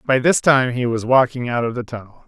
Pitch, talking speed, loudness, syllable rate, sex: 125 Hz, 265 wpm, -18 LUFS, 5.5 syllables/s, male